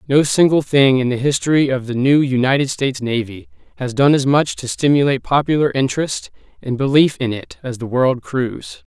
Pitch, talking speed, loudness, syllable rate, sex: 135 Hz, 190 wpm, -17 LUFS, 5.5 syllables/s, male